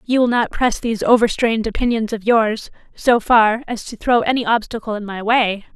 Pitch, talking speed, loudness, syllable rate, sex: 225 Hz, 200 wpm, -17 LUFS, 5.3 syllables/s, female